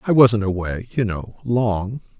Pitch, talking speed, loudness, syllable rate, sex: 110 Hz, 165 wpm, -20 LUFS, 3.9 syllables/s, male